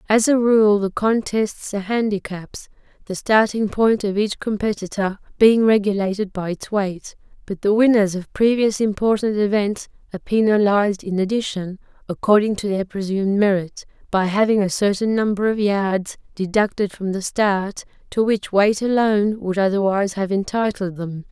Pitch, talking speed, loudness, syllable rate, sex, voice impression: 205 Hz, 150 wpm, -19 LUFS, 4.9 syllables/s, female, very feminine, slightly young, adult-like, thin, relaxed, slightly weak, slightly dark, slightly hard, clear, fluent, cute, very intellectual, refreshing, sincere, very calm, friendly, very reassuring, unique, very elegant, sweet, slightly lively, very kind, very modest